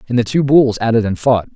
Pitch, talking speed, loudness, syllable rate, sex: 120 Hz, 310 wpm, -14 LUFS, 6.0 syllables/s, male